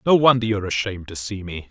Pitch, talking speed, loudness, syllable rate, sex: 105 Hz, 280 wpm, -21 LUFS, 7.6 syllables/s, male